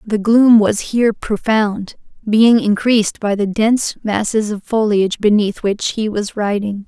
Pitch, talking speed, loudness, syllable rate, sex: 215 Hz, 155 wpm, -15 LUFS, 4.4 syllables/s, female